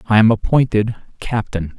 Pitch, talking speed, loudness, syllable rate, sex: 110 Hz, 170 wpm, -17 LUFS, 5.9 syllables/s, male